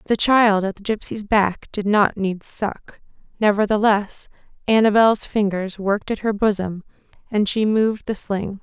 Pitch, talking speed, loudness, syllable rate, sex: 205 Hz, 155 wpm, -20 LUFS, 4.4 syllables/s, female